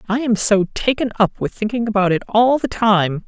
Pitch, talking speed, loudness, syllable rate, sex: 215 Hz, 220 wpm, -17 LUFS, 5.0 syllables/s, female